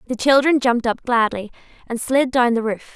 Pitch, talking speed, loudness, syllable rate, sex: 245 Hz, 205 wpm, -18 LUFS, 5.7 syllables/s, female